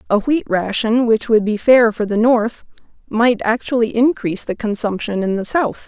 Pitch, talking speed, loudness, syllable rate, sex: 225 Hz, 185 wpm, -17 LUFS, 4.8 syllables/s, female